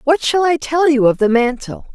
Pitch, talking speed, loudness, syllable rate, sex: 280 Hz, 245 wpm, -15 LUFS, 5.0 syllables/s, female